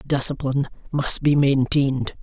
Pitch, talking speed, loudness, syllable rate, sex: 135 Hz, 110 wpm, -20 LUFS, 4.8 syllables/s, female